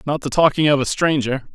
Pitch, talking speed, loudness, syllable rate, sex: 145 Hz, 195 wpm, -18 LUFS, 5.8 syllables/s, male